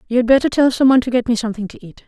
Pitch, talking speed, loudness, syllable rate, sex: 240 Hz, 350 wpm, -15 LUFS, 8.6 syllables/s, female